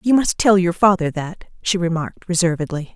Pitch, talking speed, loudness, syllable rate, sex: 180 Hz, 185 wpm, -18 LUFS, 5.8 syllables/s, female